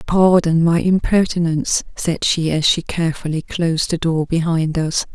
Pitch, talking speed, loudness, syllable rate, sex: 165 Hz, 150 wpm, -17 LUFS, 4.8 syllables/s, female